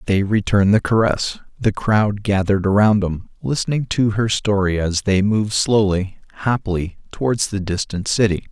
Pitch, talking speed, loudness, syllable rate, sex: 100 Hz, 155 wpm, -19 LUFS, 5.1 syllables/s, male